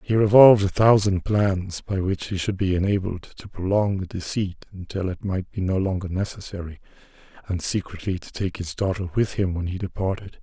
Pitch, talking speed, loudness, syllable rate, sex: 95 Hz, 190 wpm, -23 LUFS, 5.3 syllables/s, male